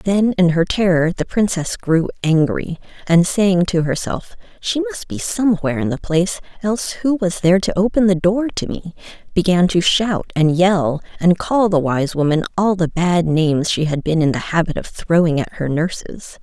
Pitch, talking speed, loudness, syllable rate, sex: 175 Hz, 195 wpm, -17 LUFS, 4.9 syllables/s, female